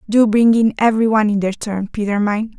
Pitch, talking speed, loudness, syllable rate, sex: 215 Hz, 230 wpm, -16 LUFS, 5.9 syllables/s, female